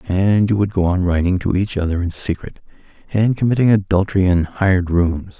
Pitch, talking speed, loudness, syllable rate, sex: 95 Hz, 190 wpm, -17 LUFS, 5.5 syllables/s, male